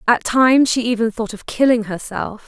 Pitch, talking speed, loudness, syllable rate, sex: 230 Hz, 195 wpm, -17 LUFS, 5.2 syllables/s, female